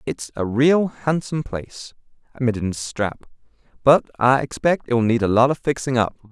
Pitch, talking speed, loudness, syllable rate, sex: 125 Hz, 180 wpm, -20 LUFS, 5.5 syllables/s, male